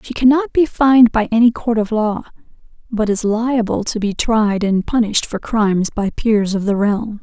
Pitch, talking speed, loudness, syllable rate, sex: 220 Hz, 200 wpm, -16 LUFS, 4.8 syllables/s, female